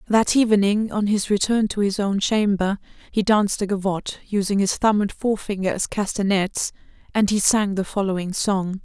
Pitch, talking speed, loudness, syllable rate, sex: 200 Hz, 175 wpm, -21 LUFS, 5.2 syllables/s, female